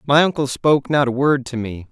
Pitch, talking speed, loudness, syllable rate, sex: 135 Hz, 250 wpm, -18 LUFS, 5.7 syllables/s, male